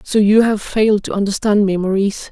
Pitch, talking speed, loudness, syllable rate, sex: 205 Hz, 205 wpm, -15 LUFS, 5.9 syllables/s, female